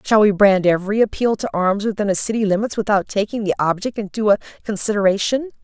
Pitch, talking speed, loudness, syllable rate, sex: 205 Hz, 190 wpm, -18 LUFS, 6.3 syllables/s, female